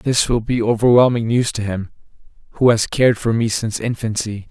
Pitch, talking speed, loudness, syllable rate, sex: 115 Hz, 185 wpm, -17 LUFS, 5.6 syllables/s, male